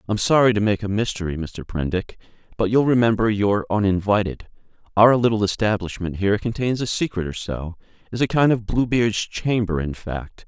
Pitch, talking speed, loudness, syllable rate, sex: 105 Hz, 180 wpm, -21 LUFS, 5.4 syllables/s, male